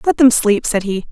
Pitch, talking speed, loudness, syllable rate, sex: 225 Hz, 270 wpm, -14 LUFS, 5.1 syllables/s, female